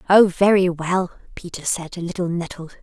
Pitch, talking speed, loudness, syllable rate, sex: 175 Hz, 170 wpm, -20 LUFS, 4.9 syllables/s, female